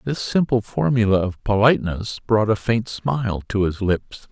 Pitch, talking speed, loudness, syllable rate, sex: 110 Hz, 165 wpm, -20 LUFS, 4.7 syllables/s, male